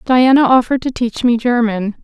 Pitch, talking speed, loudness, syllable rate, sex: 240 Hz, 175 wpm, -14 LUFS, 5.3 syllables/s, female